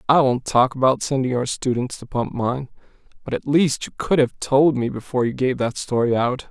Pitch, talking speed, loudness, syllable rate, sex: 130 Hz, 220 wpm, -21 LUFS, 5.2 syllables/s, male